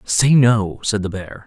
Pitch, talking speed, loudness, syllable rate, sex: 105 Hz, 205 wpm, -17 LUFS, 3.7 syllables/s, male